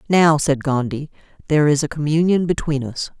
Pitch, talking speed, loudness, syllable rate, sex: 150 Hz, 170 wpm, -18 LUFS, 5.5 syllables/s, female